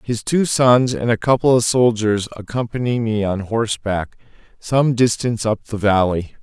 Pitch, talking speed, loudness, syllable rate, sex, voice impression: 115 Hz, 160 wpm, -18 LUFS, 4.7 syllables/s, male, masculine, adult-like, slightly clear, slightly intellectual, slightly refreshing, sincere